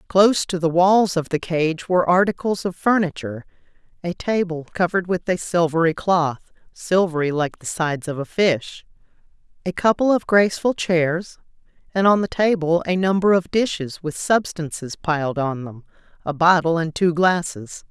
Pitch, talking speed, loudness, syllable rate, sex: 175 Hz, 160 wpm, -20 LUFS, 4.9 syllables/s, female